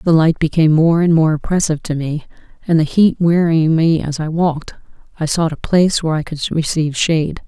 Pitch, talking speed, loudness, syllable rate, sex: 160 Hz, 210 wpm, -15 LUFS, 6.0 syllables/s, female